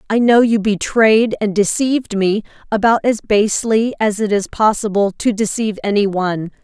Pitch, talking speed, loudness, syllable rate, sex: 215 Hz, 165 wpm, -16 LUFS, 5.1 syllables/s, female